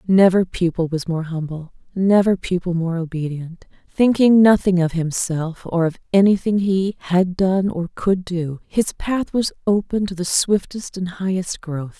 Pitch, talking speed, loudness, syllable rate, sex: 180 Hz, 160 wpm, -19 LUFS, 4.3 syllables/s, female